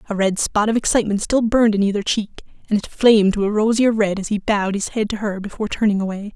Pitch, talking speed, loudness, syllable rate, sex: 210 Hz, 255 wpm, -19 LUFS, 6.6 syllables/s, female